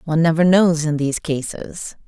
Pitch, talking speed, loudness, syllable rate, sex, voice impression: 160 Hz, 175 wpm, -18 LUFS, 5.4 syllables/s, female, feminine, adult-like, slightly thin, tensed, slightly weak, clear, nasal, calm, friendly, reassuring, slightly sharp